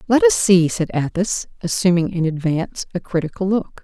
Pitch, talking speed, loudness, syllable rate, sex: 175 Hz, 170 wpm, -19 LUFS, 5.2 syllables/s, female